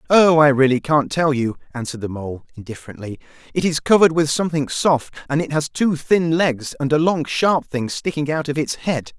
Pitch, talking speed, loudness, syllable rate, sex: 145 Hz, 210 wpm, -19 LUFS, 5.4 syllables/s, male